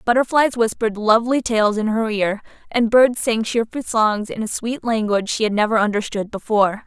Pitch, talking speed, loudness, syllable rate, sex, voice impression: 220 Hz, 185 wpm, -19 LUFS, 5.4 syllables/s, female, feminine, slightly adult-like, slightly clear, slightly sincere, slightly friendly, slightly unique